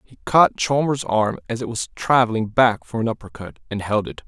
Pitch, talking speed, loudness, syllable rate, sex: 120 Hz, 210 wpm, -20 LUFS, 5.2 syllables/s, male